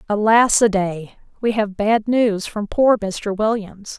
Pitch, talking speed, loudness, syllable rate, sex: 210 Hz, 165 wpm, -18 LUFS, 3.6 syllables/s, female